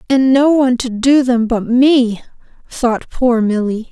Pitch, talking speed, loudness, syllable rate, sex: 245 Hz, 170 wpm, -14 LUFS, 4.0 syllables/s, female